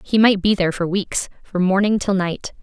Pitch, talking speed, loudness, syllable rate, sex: 195 Hz, 230 wpm, -19 LUFS, 5.1 syllables/s, female